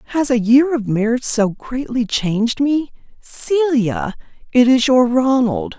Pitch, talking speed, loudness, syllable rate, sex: 250 Hz, 145 wpm, -16 LUFS, 4.1 syllables/s, female